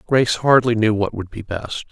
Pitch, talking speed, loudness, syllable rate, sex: 110 Hz, 220 wpm, -18 LUFS, 5.1 syllables/s, male